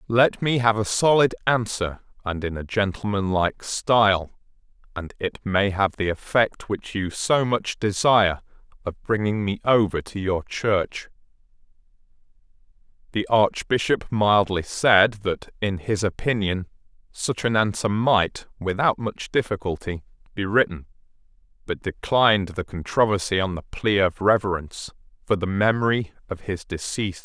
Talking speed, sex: 135 wpm, male